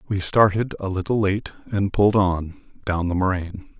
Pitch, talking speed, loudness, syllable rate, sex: 95 Hz, 175 wpm, -22 LUFS, 5.4 syllables/s, male